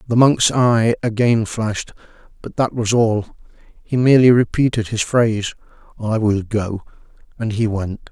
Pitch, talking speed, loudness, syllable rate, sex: 110 Hz, 140 wpm, -17 LUFS, 4.6 syllables/s, male